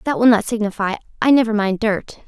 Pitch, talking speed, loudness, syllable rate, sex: 215 Hz, 210 wpm, -18 LUFS, 5.9 syllables/s, female